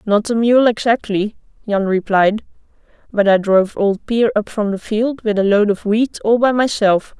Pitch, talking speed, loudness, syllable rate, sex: 215 Hz, 190 wpm, -16 LUFS, 4.7 syllables/s, female